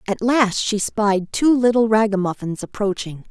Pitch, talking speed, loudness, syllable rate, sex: 210 Hz, 145 wpm, -19 LUFS, 4.5 syllables/s, female